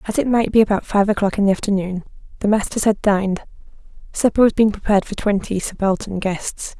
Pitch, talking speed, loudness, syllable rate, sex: 200 Hz, 195 wpm, -19 LUFS, 6.1 syllables/s, female